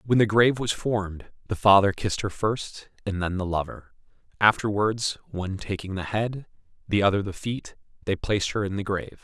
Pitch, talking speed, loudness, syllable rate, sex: 100 Hz, 190 wpm, -25 LUFS, 5.4 syllables/s, male